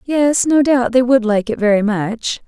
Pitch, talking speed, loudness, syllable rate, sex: 240 Hz, 220 wpm, -15 LUFS, 4.2 syllables/s, female